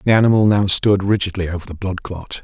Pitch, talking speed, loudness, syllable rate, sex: 95 Hz, 220 wpm, -17 LUFS, 6.1 syllables/s, male